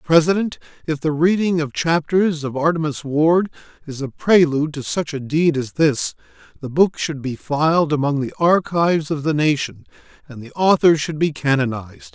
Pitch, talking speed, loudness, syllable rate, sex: 155 Hz, 175 wpm, -19 LUFS, 5.0 syllables/s, male